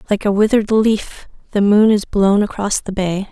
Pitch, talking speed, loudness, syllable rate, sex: 205 Hz, 200 wpm, -15 LUFS, 4.9 syllables/s, female